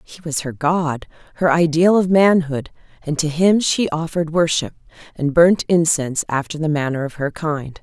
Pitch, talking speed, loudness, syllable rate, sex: 160 Hz, 175 wpm, -18 LUFS, 4.9 syllables/s, female